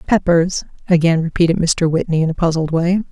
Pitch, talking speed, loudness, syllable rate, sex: 170 Hz, 175 wpm, -16 LUFS, 5.6 syllables/s, female